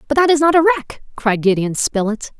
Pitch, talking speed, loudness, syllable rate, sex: 250 Hz, 225 wpm, -16 LUFS, 5.8 syllables/s, female